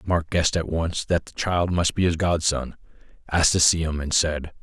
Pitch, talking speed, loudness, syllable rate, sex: 80 Hz, 220 wpm, -22 LUFS, 5.1 syllables/s, male